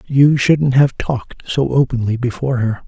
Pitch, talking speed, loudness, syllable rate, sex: 130 Hz, 165 wpm, -16 LUFS, 4.8 syllables/s, male